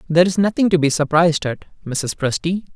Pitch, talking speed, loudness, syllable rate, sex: 165 Hz, 175 wpm, -18 LUFS, 5.4 syllables/s, male